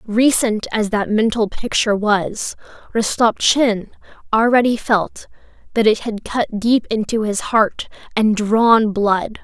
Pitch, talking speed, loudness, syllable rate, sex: 220 Hz, 125 wpm, -17 LUFS, 3.8 syllables/s, female